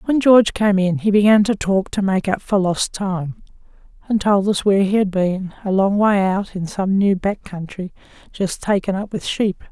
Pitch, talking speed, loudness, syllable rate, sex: 195 Hz, 210 wpm, -18 LUFS, 4.7 syllables/s, female